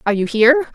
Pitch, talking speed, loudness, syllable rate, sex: 250 Hz, 240 wpm, -14 LUFS, 8.3 syllables/s, female